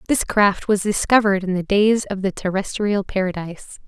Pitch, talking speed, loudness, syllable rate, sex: 200 Hz, 170 wpm, -19 LUFS, 5.3 syllables/s, female